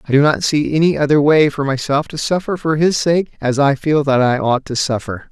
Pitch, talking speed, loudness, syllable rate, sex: 145 Hz, 250 wpm, -16 LUFS, 5.4 syllables/s, male